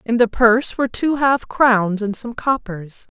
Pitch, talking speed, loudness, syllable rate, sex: 230 Hz, 190 wpm, -17 LUFS, 4.3 syllables/s, female